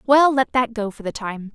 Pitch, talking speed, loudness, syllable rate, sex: 235 Hz, 270 wpm, -20 LUFS, 5.0 syllables/s, female